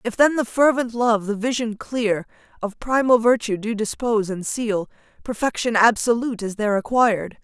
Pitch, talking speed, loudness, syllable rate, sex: 225 Hz, 160 wpm, -21 LUFS, 5.1 syllables/s, female